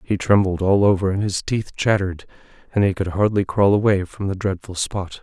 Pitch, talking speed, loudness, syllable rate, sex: 95 Hz, 205 wpm, -20 LUFS, 5.4 syllables/s, male